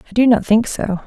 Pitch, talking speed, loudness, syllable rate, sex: 220 Hz, 280 wpm, -16 LUFS, 5.2 syllables/s, female